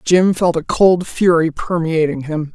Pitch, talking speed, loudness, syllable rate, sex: 165 Hz, 165 wpm, -16 LUFS, 4.1 syllables/s, female